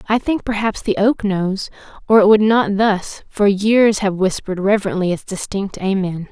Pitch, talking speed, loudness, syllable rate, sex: 200 Hz, 180 wpm, -17 LUFS, 4.8 syllables/s, female